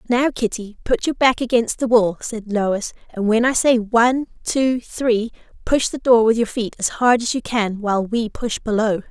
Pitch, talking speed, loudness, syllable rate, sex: 230 Hz, 210 wpm, -19 LUFS, 4.7 syllables/s, female